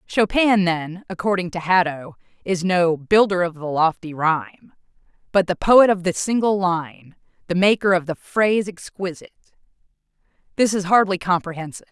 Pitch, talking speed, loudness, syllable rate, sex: 180 Hz, 145 wpm, -19 LUFS, 5.0 syllables/s, female